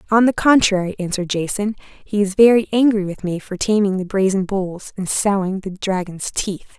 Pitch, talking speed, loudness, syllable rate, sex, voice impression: 195 Hz, 185 wpm, -18 LUFS, 5.1 syllables/s, female, feminine, slightly adult-like, slightly cute, sincere, slightly calm, kind